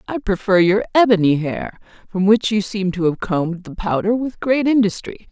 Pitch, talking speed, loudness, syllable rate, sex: 205 Hz, 190 wpm, -18 LUFS, 5.1 syllables/s, female